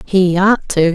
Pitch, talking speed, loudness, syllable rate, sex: 185 Hz, 190 wpm, -14 LUFS, 3.3 syllables/s, female